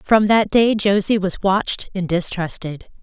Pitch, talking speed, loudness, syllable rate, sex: 195 Hz, 160 wpm, -18 LUFS, 4.4 syllables/s, female